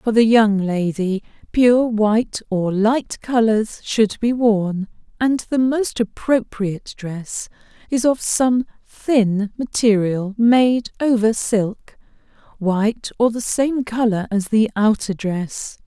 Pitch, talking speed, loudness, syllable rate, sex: 220 Hz, 130 wpm, -19 LUFS, 3.4 syllables/s, female